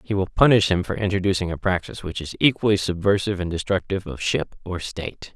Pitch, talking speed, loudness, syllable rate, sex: 95 Hz, 200 wpm, -22 LUFS, 6.5 syllables/s, male